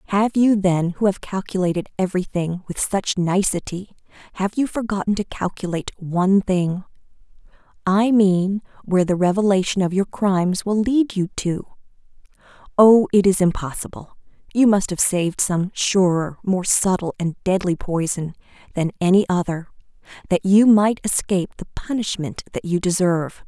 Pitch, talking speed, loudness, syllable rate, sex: 190 Hz, 140 wpm, -20 LUFS, 4.9 syllables/s, female